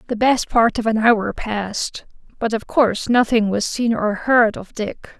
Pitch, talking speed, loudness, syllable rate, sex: 225 Hz, 195 wpm, -19 LUFS, 4.3 syllables/s, female